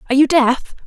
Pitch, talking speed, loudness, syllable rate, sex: 275 Hz, 205 wpm, -15 LUFS, 6.9 syllables/s, female